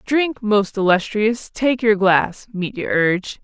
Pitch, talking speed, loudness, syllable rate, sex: 210 Hz, 140 wpm, -18 LUFS, 3.7 syllables/s, female